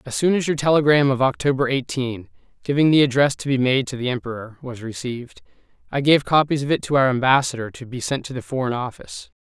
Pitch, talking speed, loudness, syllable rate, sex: 130 Hz, 215 wpm, -20 LUFS, 6.2 syllables/s, male